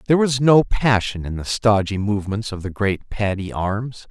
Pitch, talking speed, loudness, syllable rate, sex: 110 Hz, 190 wpm, -20 LUFS, 4.8 syllables/s, male